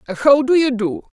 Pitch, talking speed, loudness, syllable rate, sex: 255 Hz, 205 wpm, -16 LUFS, 7.1 syllables/s, female